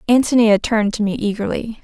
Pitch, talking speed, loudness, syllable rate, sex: 215 Hz, 165 wpm, -17 LUFS, 6.0 syllables/s, female